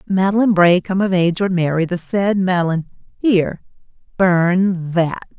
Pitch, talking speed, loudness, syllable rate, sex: 180 Hz, 110 wpm, -17 LUFS, 5.3 syllables/s, female